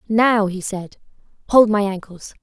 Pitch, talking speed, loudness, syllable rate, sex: 205 Hz, 150 wpm, -17 LUFS, 4.1 syllables/s, female